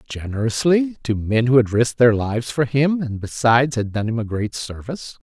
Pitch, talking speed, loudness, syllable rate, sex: 120 Hz, 205 wpm, -19 LUFS, 5.4 syllables/s, male